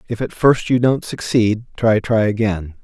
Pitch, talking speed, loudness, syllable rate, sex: 110 Hz, 190 wpm, -17 LUFS, 4.4 syllables/s, male